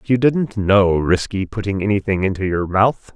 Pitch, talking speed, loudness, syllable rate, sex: 100 Hz, 190 wpm, -18 LUFS, 4.9 syllables/s, male